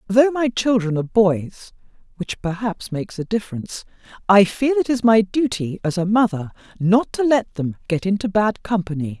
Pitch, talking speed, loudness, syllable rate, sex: 205 Hz, 175 wpm, -20 LUFS, 4.2 syllables/s, female